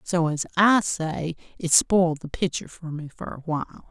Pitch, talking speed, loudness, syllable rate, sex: 165 Hz, 200 wpm, -24 LUFS, 5.1 syllables/s, female